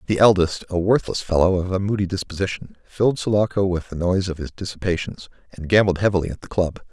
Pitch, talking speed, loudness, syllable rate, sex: 95 Hz, 200 wpm, -21 LUFS, 6.4 syllables/s, male